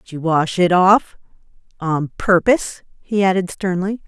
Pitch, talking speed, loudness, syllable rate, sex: 185 Hz, 135 wpm, -17 LUFS, 4.6 syllables/s, female